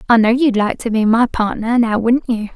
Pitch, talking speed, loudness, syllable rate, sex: 230 Hz, 260 wpm, -15 LUFS, 5.1 syllables/s, female